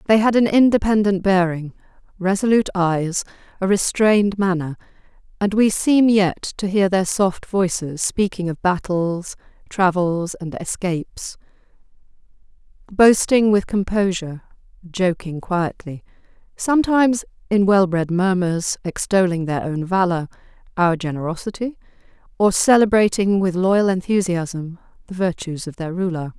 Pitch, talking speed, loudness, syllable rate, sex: 190 Hz, 115 wpm, -19 LUFS, 4.5 syllables/s, female